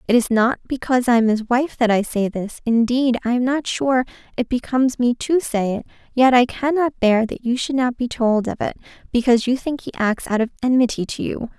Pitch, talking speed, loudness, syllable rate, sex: 245 Hz, 230 wpm, -19 LUFS, 5.6 syllables/s, female